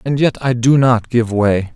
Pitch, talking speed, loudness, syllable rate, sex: 120 Hz, 240 wpm, -14 LUFS, 4.2 syllables/s, male